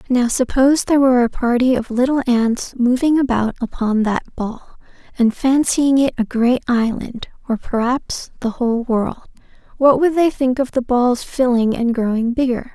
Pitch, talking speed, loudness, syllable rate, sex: 250 Hz, 165 wpm, -17 LUFS, 4.8 syllables/s, female